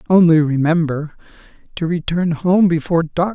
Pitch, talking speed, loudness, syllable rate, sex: 165 Hz, 125 wpm, -16 LUFS, 4.9 syllables/s, male